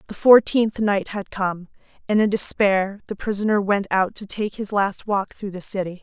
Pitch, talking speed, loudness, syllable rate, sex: 200 Hz, 200 wpm, -21 LUFS, 4.7 syllables/s, female